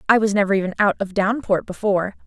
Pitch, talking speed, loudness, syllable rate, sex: 200 Hz, 210 wpm, -20 LUFS, 6.8 syllables/s, female